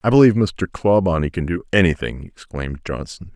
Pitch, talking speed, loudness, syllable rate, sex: 90 Hz, 160 wpm, -19 LUFS, 5.7 syllables/s, male